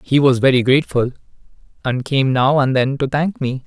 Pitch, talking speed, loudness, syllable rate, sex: 135 Hz, 195 wpm, -17 LUFS, 5.5 syllables/s, male